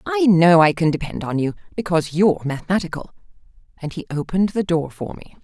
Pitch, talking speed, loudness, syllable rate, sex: 175 Hz, 190 wpm, -19 LUFS, 6.2 syllables/s, female